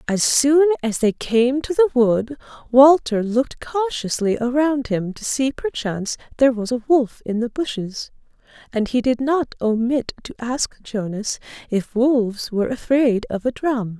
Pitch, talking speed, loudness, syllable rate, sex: 245 Hz, 165 wpm, -20 LUFS, 4.4 syllables/s, female